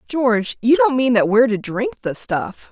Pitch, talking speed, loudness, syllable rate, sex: 240 Hz, 220 wpm, -18 LUFS, 5.2 syllables/s, female